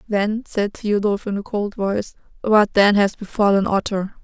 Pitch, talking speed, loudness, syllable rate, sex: 205 Hz, 170 wpm, -19 LUFS, 4.6 syllables/s, female